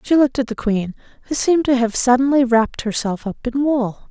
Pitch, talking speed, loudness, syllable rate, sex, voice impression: 250 Hz, 220 wpm, -18 LUFS, 5.9 syllables/s, female, feminine, adult-like, bright, slightly soft, clear, slightly intellectual, friendly, unique, slightly lively, kind, light